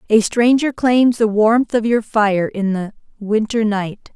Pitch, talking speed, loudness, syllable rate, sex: 220 Hz, 175 wpm, -16 LUFS, 3.8 syllables/s, female